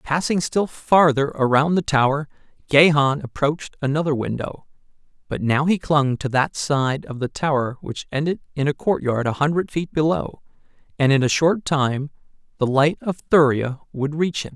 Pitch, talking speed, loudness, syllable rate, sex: 145 Hz, 170 wpm, -20 LUFS, 4.8 syllables/s, male